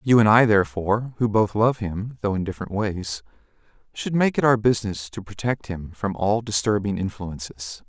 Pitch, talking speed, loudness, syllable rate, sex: 105 Hz, 185 wpm, -23 LUFS, 5.2 syllables/s, male